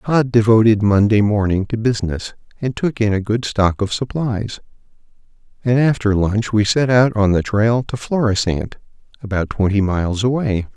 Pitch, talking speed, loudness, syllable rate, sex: 110 Hz, 160 wpm, -17 LUFS, 4.8 syllables/s, male